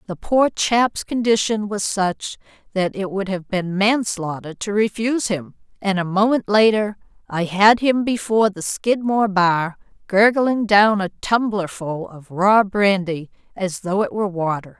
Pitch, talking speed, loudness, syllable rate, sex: 200 Hz, 155 wpm, -19 LUFS, 4.3 syllables/s, female